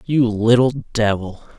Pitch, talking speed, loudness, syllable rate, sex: 115 Hz, 115 wpm, -18 LUFS, 3.5 syllables/s, male